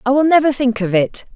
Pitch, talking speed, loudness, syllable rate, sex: 250 Hz, 265 wpm, -15 LUFS, 5.9 syllables/s, female